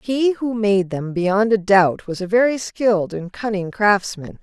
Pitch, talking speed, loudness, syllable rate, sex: 205 Hz, 190 wpm, -19 LUFS, 4.2 syllables/s, female